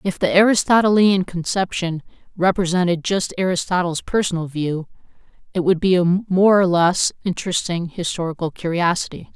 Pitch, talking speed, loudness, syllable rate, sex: 180 Hz, 120 wpm, -19 LUFS, 5.2 syllables/s, female